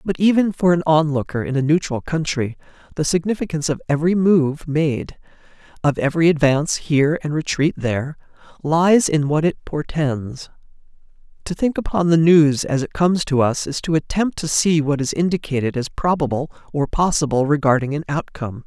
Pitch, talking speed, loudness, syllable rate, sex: 155 Hz, 165 wpm, -19 LUFS, 5.4 syllables/s, male